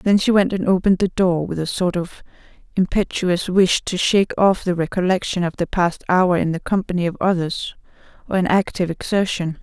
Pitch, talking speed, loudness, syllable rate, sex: 180 Hz, 195 wpm, -19 LUFS, 5.5 syllables/s, female